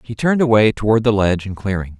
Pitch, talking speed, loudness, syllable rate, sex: 110 Hz, 240 wpm, -16 LUFS, 6.9 syllables/s, male